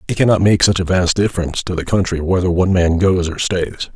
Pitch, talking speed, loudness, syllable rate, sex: 90 Hz, 240 wpm, -16 LUFS, 6.6 syllables/s, male